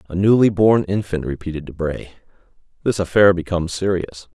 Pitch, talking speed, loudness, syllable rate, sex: 90 Hz, 135 wpm, -18 LUFS, 5.6 syllables/s, male